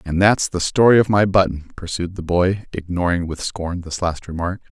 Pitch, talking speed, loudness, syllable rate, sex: 90 Hz, 200 wpm, -19 LUFS, 5.0 syllables/s, male